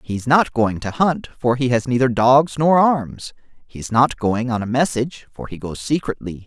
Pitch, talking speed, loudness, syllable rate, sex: 125 Hz, 205 wpm, -18 LUFS, 4.6 syllables/s, male